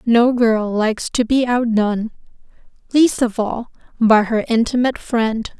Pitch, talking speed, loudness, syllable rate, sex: 230 Hz, 140 wpm, -17 LUFS, 4.4 syllables/s, female